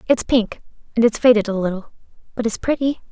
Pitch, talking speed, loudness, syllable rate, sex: 230 Hz, 195 wpm, -19 LUFS, 6.1 syllables/s, female